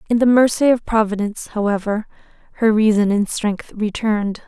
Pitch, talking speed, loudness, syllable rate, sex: 215 Hz, 150 wpm, -18 LUFS, 5.5 syllables/s, female